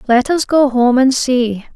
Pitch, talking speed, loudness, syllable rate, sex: 255 Hz, 205 wpm, -13 LUFS, 3.9 syllables/s, female